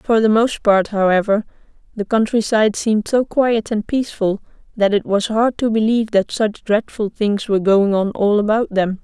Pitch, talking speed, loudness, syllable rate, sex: 215 Hz, 185 wpm, -17 LUFS, 5.0 syllables/s, female